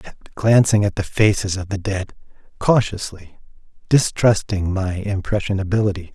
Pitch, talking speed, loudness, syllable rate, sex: 100 Hz, 125 wpm, -19 LUFS, 4.9 syllables/s, male